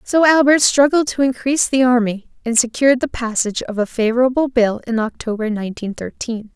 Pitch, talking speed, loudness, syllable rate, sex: 245 Hz, 175 wpm, -17 LUFS, 5.8 syllables/s, female